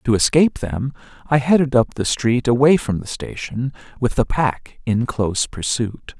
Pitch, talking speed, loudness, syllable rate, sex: 125 Hz, 175 wpm, -19 LUFS, 4.7 syllables/s, male